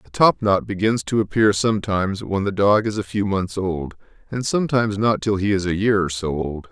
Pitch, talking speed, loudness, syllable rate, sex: 100 Hz, 225 wpm, -20 LUFS, 5.4 syllables/s, male